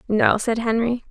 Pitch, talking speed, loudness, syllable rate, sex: 225 Hz, 165 wpm, -20 LUFS, 4.4 syllables/s, female